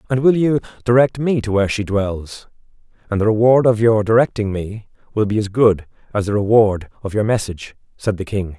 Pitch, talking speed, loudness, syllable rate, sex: 110 Hz, 205 wpm, -17 LUFS, 5.5 syllables/s, male